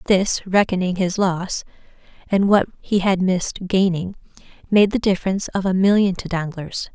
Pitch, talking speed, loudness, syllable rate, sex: 190 Hz, 155 wpm, -20 LUFS, 5.0 syllables/s, female